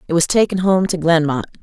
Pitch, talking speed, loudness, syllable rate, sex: 170 Hz, 220 wpm, -16 LUFS, 6.3 syllables/s, female